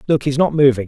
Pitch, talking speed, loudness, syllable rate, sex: 140 Hz, 275 wpm, -15 LUFS, 6.8 syllables/s, male